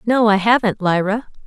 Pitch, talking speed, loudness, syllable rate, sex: 210 Hz, 165 wpm, -17 LUFS, 4.9 syllables/s, female